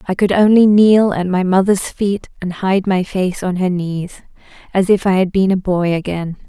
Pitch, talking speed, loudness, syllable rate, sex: 190 Hz, 215 wpm, -15 LUFS, 4.6 syllables/s, female